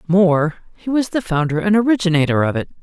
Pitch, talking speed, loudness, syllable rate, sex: 180 Hz, 190 wpm, -17 LUFS, 6.0 syllables/s, female